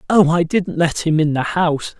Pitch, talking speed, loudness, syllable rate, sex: 165 Hz, 240 wpm, -17 LUFS, 5.1 syllables/s, male